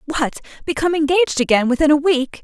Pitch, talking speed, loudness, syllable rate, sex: 295 Hz, 175 wpm, -17 LUFS, 6.6 syllables/s, female